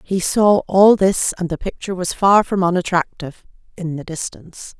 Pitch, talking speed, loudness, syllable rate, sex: 180 Hz, 165 wpm, -17 LUFS, 5.1 syllables/s, female